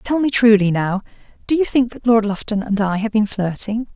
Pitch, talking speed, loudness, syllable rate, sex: 220 Hz, 230 wpm, -18 LUFS, 5.2 syllables/s, female